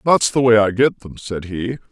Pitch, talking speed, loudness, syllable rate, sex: 115 Hz, 250 wpm, -17 LUFS, 4.8 syllables/s, male